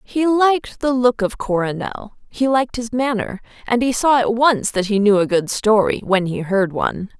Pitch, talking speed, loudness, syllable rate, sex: 225 Hz, 200 wpm, -18 LUFS, 4.8 syllables/s, female